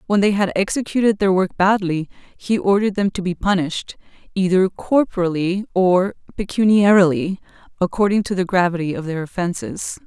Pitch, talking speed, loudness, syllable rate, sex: 190 Hz, 145 wpm, -19 LUFS, 5.4 syllables/s, female